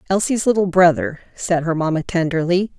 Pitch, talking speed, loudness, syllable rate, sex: 180 Hz, 150 wpm, -18 LUFS, 5.4 syllables/s, female